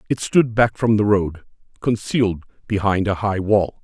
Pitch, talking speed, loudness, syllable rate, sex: 105 Hz, 170 wpm, -19 LUFS, 4.7 syllables/s, male